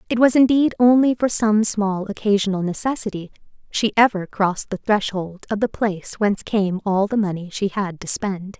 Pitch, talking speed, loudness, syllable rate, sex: 205 Hz, 180 wpm, -20 LUFS, 5.1 syllables/s, female